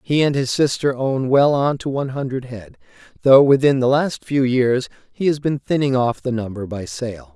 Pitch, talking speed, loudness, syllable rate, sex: 130 Hz, 210 wpm, -18 LUFS, 4.9 syllables/s, male